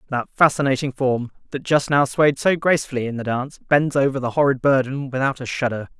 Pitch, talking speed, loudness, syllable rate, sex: 135 Hz, 200 wpm, -20 LUFS, 6.0 syllables/s, male